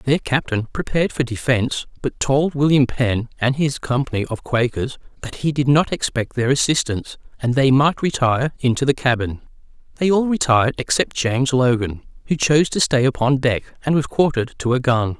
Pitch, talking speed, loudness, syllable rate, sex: 130 Hz, 180 wpm, -19 LUFS, 5.5 syllables/s, male